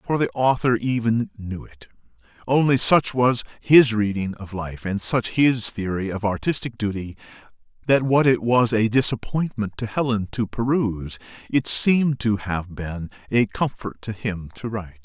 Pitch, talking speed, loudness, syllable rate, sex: 110 Hz, 165 wpm, -22 LUFS, 4.6 syllables/s, male